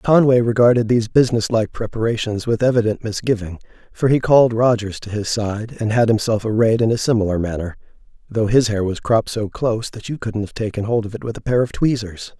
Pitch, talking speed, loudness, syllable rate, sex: 110 Hz, 215 wpm, -18 LUFS, 5.9 syllables/s, male